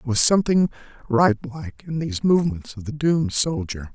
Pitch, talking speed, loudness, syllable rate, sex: 135 Hz, 180 wpm, -21 LUFS, 6.2 syllables/s, male